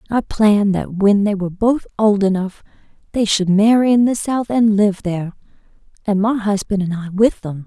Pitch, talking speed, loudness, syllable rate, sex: 205 Hz, 190 wpm, -16 LUFS, 5.2 syllables/s, female